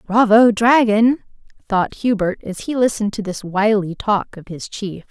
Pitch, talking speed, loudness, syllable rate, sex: 210 Hz, 165 wpm, -17 LUFS, 4.4 syllables/s, female